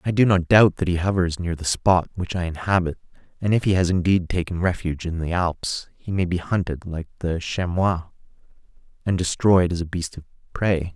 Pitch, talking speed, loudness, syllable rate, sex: 90 Hz, 205 wpm, -22 LUFS, 5.3 syllables/s, male